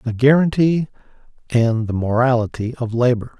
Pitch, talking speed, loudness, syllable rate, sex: 125 Hz, 125 wpm, -18 LUFS, 4.8 syllables/s, male